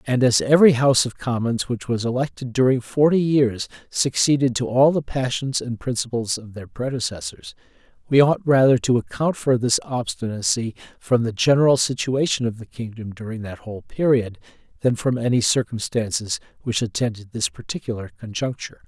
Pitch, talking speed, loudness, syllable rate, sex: 120 Hz, 160 wpm, -21 LUFS, 5.4 syllables/s, male